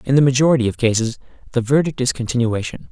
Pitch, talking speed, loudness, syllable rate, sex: 125 Hz, 185 wpm, -18 LUFS, 6.9 syllables/s, male